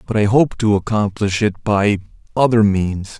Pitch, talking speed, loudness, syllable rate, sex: 105 Hz, 170 wpm, -17 LUFS, 4.9 syllables/s, male